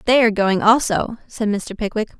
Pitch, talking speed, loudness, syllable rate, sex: 215 Hz, 190 wpm, -18 LUFS, 5.4 syllables/s, female